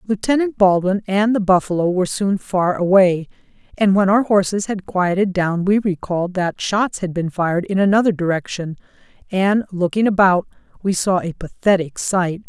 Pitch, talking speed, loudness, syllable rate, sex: 190 Hz, 165 wpm, -18 LUFS, 5.0 syllables/s, female